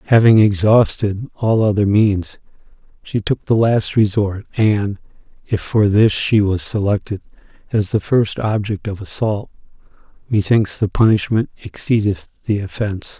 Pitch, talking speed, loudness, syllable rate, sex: 105 Hz, 130 wpm, -17 LUFS, 4.4 syllables/s, male